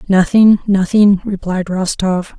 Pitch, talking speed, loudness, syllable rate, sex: 195 Hz, 100 wpm, -13 LUFS, 3.8 syllables/s, female